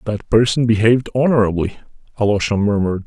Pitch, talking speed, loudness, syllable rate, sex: 110 Hz, 120 wpm, -16 LUFS, 6.7 syllables/s, male